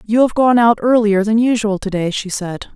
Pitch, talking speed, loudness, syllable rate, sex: 215 Hz, 240 wpm, -15 LUFS, 4.9 syllables/s, female